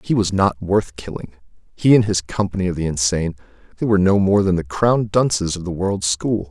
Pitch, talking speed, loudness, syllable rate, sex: 95 Hz, 210 wpm, -18 LUFS, 5.8 syllables/s, male